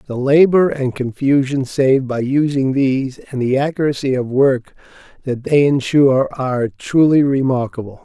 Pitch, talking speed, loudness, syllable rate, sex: 135 Hz, 140 wpm, -16 LUFS, 4.8 syllables/s, male